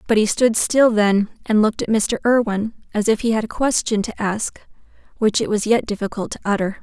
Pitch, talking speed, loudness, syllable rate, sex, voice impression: 215 Hz, 220 wpm, -19 LUFS, 5.7 syllables/s, female, very feminine, slightly young, very adult-like, slightly thin, slightly tensed, slightly weak, slightly bright, soft, very clear, fluent, cute, intellectual, very refreshing, sincere, calm, very friendly, very reassuring, unique, very elegant, slightly wild, very sweet, lively, kind, slightly intense, sharp, light